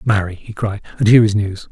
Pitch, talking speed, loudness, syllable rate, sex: 105 Hz, 245 wpm, -16 LUFS, 6.2 syllables/s, male